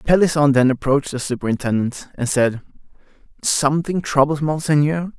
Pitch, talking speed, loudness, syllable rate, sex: 145 Hz, 115 wpm, -19 LUFS, 5.5 syllables/s, male